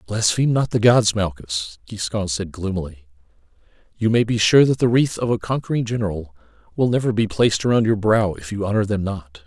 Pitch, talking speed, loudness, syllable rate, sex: 105 Hz, 195 wpm, -20 LUFS, 5.7 syllables/s, male